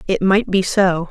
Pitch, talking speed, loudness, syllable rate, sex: 190 Hz, 215 wpm, -16 LUFS, 4.2 syllables/s, female